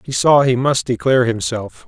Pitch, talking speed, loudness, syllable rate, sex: 125 Hz, 190 wpm, -16 LUFS, 5.1 syllables/s, male